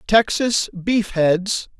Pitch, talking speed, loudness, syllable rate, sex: 200 Hz, 100 wpm, -19 LUFS, 2.6 syllables/s, male